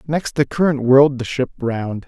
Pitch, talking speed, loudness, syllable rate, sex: 135 Hz, 205 wpm, -17 LUFS, 4.9 syllables/s, male